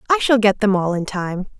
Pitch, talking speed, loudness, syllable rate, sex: 205 Hz, 265 wpm, -18 LUFS, 5.5 syllables/s, female